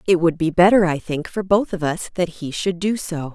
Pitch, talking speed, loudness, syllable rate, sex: 175 Hz, 270 wpm, -20 LUFS, 5.1 syllables/s, female